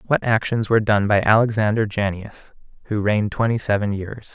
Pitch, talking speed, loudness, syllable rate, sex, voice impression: 105 Hz, 165 wpm, -20 LUFS, 5.3 syllables/s, male, masculine, adult-like, slightly thick, cool, sincere, slightly calm, slightly sweet